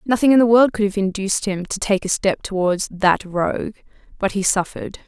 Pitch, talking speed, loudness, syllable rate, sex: 200 Hz, 215 wpm, -19 LUFS, 5.5 syllables/s, female